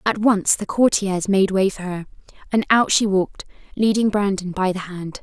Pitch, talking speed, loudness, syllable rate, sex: 195 Hz, 195 wpm, -19 LUFS, 4.8 syllables/s, female